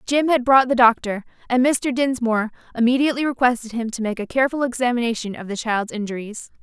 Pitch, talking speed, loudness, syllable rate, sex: 240 Hz, 180 wpm, -20 LUFS, 6.3 syllables/s, female